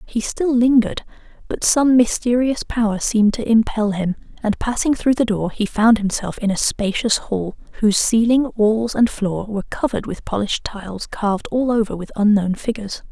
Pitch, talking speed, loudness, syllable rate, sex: 220 Hz, 180 wpm, -19 LUFS, 5.3 syllables/s, female